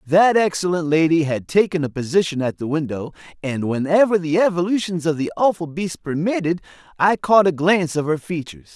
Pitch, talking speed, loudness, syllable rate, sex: 165 Hz, 180 wpm, -19 LUFS, 5.6 syllables/s, male